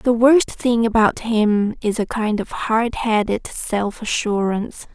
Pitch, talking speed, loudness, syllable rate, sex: 220 Hz, 160 wpm, -19 LUFS, 3.8 syllables/s, female